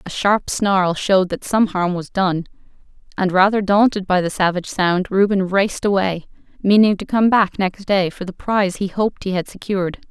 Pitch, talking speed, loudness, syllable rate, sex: 190 Hz, 195 wpm, -18 LUFS, 5.2 syllables/s, female